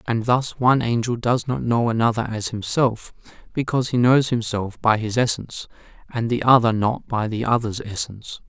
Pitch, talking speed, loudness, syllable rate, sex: 115 Hz, 175 wpm, -21 LUFS, 5.3 syllables/s, male